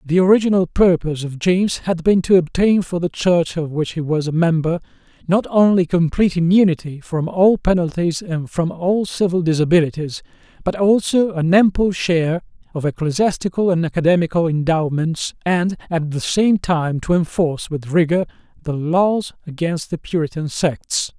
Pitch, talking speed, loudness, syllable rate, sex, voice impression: 170 Hz, 155 wpm, -18 LUFS, 5.0 syllables/s, male, masculine, slightly middle-aged, slightly thick, slightly muffled, sincere, calm, slightly reassuring, slightly kind